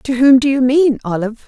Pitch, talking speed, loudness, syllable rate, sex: 255 Hz, 245 wpm, -13 LUFS, 5.8 syllables/s, female